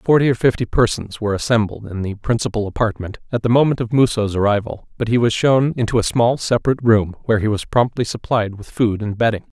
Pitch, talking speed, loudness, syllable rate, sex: 110 Hz, 215 wpm, -18 LUFS, 6.1 syllables/s, male